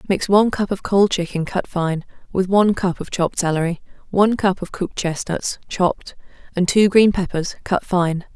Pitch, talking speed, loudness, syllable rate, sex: 185 Hz, 185 wpm, -19 LUFS, 5.3 syllables/s, female